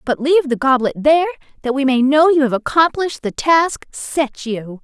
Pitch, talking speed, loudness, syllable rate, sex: 280 Hz, 200 wpm, -16 LUFS, 5.1 syllables/s, female